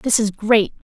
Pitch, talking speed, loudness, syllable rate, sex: 215 Hz, 180 wpm, -18 LUFS, 4.1 syllables/s, female